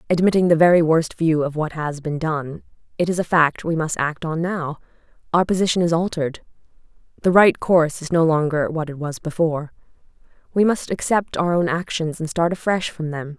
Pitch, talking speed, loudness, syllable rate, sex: 165 Hz, 195 wpm, -20 LUFS, 5.4 syllables/s, female